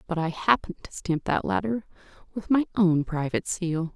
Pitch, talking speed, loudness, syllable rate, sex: 180 Hz, 180 wpm, -26 LUFS, 5.5 syllables/s, female